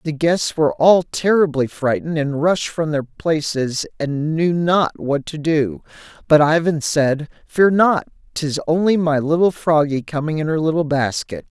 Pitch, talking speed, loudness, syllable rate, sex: 155 Hz, 165 wpm, -18 LUFS, 4.4 syllables/s, male